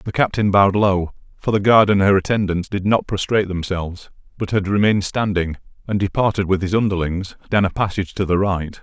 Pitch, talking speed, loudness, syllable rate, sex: 95 Hz, 195 wpm, -19 LUFS, 5.8 syllables/s, male